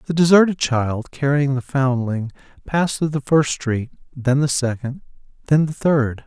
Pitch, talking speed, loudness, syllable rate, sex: 135 Hz, 165 wpm, -19 LUFS, 4.4 syllables/s, male